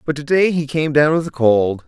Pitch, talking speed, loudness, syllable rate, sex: 145 Hz, 255 wpm, -16 LUFS, 5.1 syllables/s, male